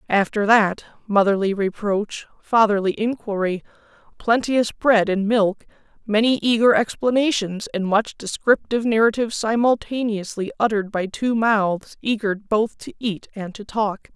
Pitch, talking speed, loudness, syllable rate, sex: 215 Hz, 125 wpm, -20 LUFS, 4.5 syllables/s, female